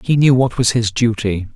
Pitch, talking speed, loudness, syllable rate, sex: 115 Hz, 230 wpm, -16 LUFS, 4.9 syllables/s, male